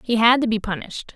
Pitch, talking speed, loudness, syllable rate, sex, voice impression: 225 Hz, 260 wpm, -20 LUFS, 6.7 syllables/s, female, feminine, adult-like, clear, refreshing, friendly, slightly lively